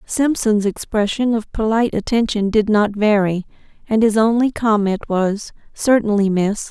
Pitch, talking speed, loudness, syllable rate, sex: 215 Hz, 135 wpm, -17 LUFS, 4.5 syllables/s, female